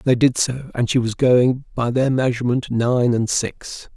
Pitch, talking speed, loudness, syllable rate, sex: 125 Hz, 195 wpm, -19 LUFS, 4.5 syllables/s, male